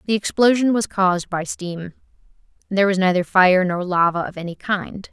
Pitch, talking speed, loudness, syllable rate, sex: 190 Hz, 175 wpm, -19 LUFS, 5.3 syllables/s, female